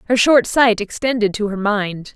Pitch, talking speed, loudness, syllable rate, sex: 220 Hz, 195 wpm, -17 LUFS, 4.6 syllables/s, female